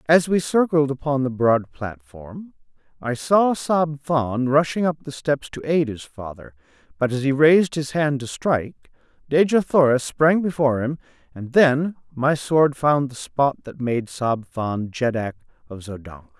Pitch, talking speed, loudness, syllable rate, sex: 140 Hz, 170 wpm, -21 LUFS, 4.4 syllables/s, male